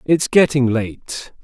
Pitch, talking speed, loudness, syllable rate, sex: 135 Hz, 125 wpm, -16 LUFS, 3.2 syllables/s, male